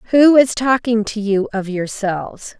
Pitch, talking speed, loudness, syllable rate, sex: 220 Hz, 160 wpm, -16 LUFS, 4.4 syllables/s, female